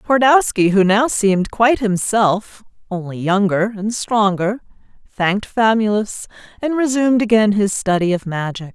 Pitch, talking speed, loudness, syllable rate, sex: 210 Hz, 130 wpm, -17 LUFS, 4.6 syllables/s, female